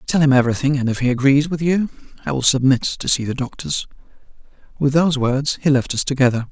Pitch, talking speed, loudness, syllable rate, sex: 135 Hz, 210 wpm, -18 LUFS, 6.3 syllables/s, male